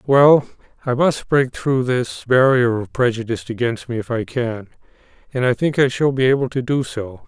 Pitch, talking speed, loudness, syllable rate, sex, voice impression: 125 Hz, 200 wpm, -18 LUFS, 5.0 syllables/s, male, very masculine, slightly old, thick, relaxed, slightly weak, dark, soft, muffled, slightly halting, cool, very intellectual, very sincere, very calm, very mature, friendly, very reassuring, very unique, elegant, slightly wild, sweet, slightly lively, very kind, modest